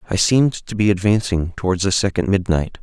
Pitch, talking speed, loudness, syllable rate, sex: 95 Hz, 190 wpm, -18 LUFS, 5.8 syllables/s, male